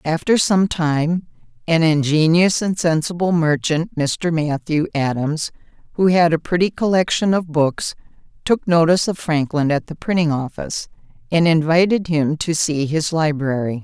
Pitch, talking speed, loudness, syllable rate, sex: 160 Hz, 145 wpm, -18 LUFS, 4.6 syllables/s, female